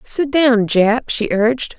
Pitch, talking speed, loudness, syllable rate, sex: 240 Hz, 170 wpm, -15 LUFS, 3.7 syllables/s, female